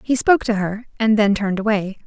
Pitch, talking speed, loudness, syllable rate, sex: 215 Hz, 230 wpm, -18 LUFS, 6.1 syllables/s, female